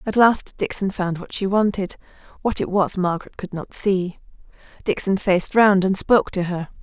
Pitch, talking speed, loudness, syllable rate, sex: 190 Hz, 185 wpm, -21 LUFS, 5.1 syllables/s, female